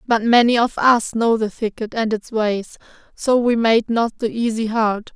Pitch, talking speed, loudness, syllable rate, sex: 225 Hz, 200 wpm, -18 LUFS, 4.4 syllables/s, female